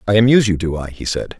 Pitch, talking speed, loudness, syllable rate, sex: 105 Hz, 300 wpm, -16 LUFS, 7.3 syllables/s, male